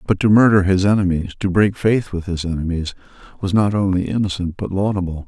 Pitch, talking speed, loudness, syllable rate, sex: 95 Hz, 195 wpm, -18 LUFS, 5.8 syllables/s, male